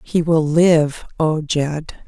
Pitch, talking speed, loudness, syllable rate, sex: 155 Hz, 145 wpm, -17 LUFS, 2.7 syllables/s, female